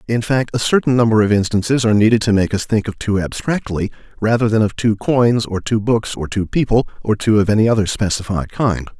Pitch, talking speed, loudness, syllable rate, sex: 110 Hz, 225 wpm, -17 LUFS, 5.8 syllables/s, male